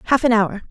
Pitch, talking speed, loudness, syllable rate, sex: 225 Hz, 255 wpm, -17 LUFS, 7.1 syllables/s, female